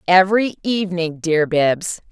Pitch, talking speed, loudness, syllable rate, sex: 180 Hz, 115 wpm, -18 LUFS, 4.4 syllables/s, female